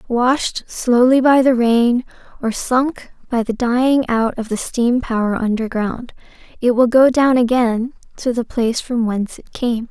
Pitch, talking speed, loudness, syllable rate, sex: 240 Hz, 170 wpm, -17 LUFS, 4.3 syllables/s, female